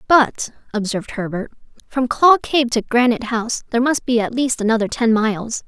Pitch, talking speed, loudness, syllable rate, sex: 235 Hz, 180 wpm, -18 LUFS, 5.5 syllables/s, female